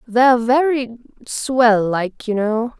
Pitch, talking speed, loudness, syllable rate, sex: 235 Hz, 130 wpm, -17 LUFS, 3.5 syllables/s, female